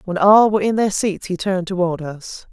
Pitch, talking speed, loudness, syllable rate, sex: 190 Hz, 240 wpm, -17 LUFS, 5.5 syllables/s, female